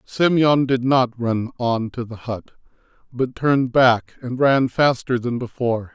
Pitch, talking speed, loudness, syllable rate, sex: 125 Hz, 160 wpm, -20 LUFS, 4.2 syllables/s, male